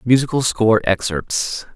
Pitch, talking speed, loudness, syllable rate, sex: 115 Hz, 105 wpm, -18 LUFS, 1.9 syllables/s, male